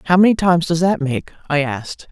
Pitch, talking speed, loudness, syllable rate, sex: 165 Hz, 225 wpm, -17 LUFS, 6.3 syllables/s, female